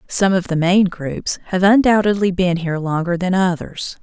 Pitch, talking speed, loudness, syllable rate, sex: 180 Hz, 180 wpm, -17 LUFS, 4.9 syllables/s, female